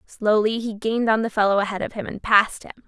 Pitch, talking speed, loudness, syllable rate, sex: 215 Hz, 250 wpm, -21 LUFS, 6.5 syllables/s, female